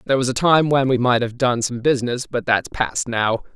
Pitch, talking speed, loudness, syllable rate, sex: 125 Hz, 255 wpm, -19 LUFS, 5.6 syllables/s, male